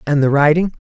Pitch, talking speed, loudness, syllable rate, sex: 150 Hz, 215 wpm, -14 LUFS, 5.9 syllables/s, male